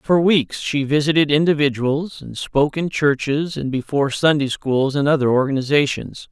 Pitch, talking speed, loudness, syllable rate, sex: 145 Hz, 150 wpm, -18 LUFS, 4.9 syllables/s, male